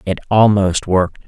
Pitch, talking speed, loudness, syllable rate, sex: 95 Hz, 140 wpm, -15 LUFS, 5.1 syllables/s, male